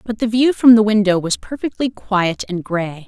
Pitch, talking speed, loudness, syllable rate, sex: 210 Hz, 215 wpm, -16 LUFS, 4.8 syllables/s, female